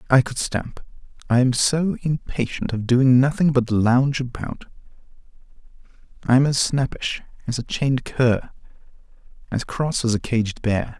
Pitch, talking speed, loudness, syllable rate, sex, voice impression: 125 Hz, 145 wpm, -21 LUFS, 4.6 syllables/s, male, very masculine, slightly old, very thick, slightly tensed, very powerful, bright, soft, muffled, slightly halting, raspy, cool, intellectual, slightly refreshing, sincere, calm, very mature, friendly, slightly reassuring, very unique, slightly elegant, wild, sweet, lively, kind, slightly modest